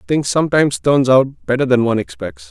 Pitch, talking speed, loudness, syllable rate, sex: 135 Hz, 190 wpm, -15 LUFS, 5.9 syllables/s, male